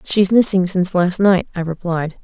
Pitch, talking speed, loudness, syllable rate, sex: 185 Hz, 190 wpm, -16 LUFS, 4.9 syllables/s, female